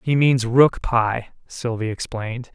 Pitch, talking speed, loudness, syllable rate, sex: 120 Hz, 140 wpm, -20 LUFS, 4.0 syllables/s, male